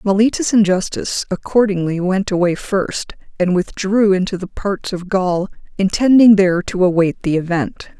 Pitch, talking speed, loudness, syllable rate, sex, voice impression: 190 Hz, 150 wpm, -16 LUFS, 4.7 syllables/s, female, very feminine, slightly middle-aged, slightly thin, slightly tensed, slightly weak, slightly dark, soft, clear, fluent, cool, very intellectual, refreshing, very sincere, calm, very friendly, very reassuring, unique, very elegant, slightly wild, slightly sweet, slightly lively, kind, modest, light